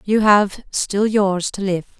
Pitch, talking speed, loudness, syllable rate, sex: 200 Hz, 180 wpm, -18 LUFS, 3.5 syllables/s, female